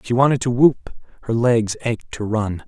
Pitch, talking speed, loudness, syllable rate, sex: 115 Hz, 200 wpm, -19 LUFS, 4.7 syllables/s, male